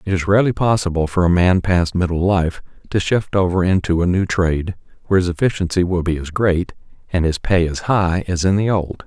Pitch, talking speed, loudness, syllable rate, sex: 90 Hz, 220 wpm, -18 LUFS, 5.6 syllables/s, male